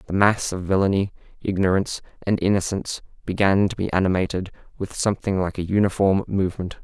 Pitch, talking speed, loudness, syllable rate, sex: 95 Hz, 150 wpm, -22 LUFS, 6.2 syllables/s, male